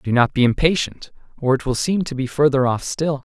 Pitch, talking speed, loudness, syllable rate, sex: 140 Hz, 235 wpm, -19 LUFS, 5.4 syllables/s, male